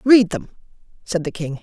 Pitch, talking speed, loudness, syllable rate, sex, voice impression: 195 Hz, 185 wpm, -20 LUFS, 4.7 syllables/s, male, slightly masculine, adult-like, slightly powerful, fluent, unique, slightly intense